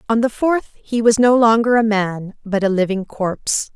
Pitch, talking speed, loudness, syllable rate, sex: 220 Hz, 210 wpm, -17 LUFS, 4.6 syllables/s, female